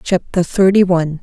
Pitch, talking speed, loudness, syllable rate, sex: 180 Hz, 145 wpm, -14 LUFS, 5.3 syllables/s, female